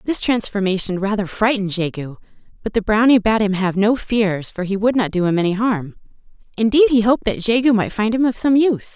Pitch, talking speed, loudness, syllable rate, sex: 215 Hz, 215 wpm, -18 LUFS, 5.8 syllables/s, female